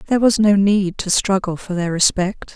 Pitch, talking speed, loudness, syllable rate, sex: 195 Hz, 210 wpm, -17 LUFS, 5.1 syllables/s, female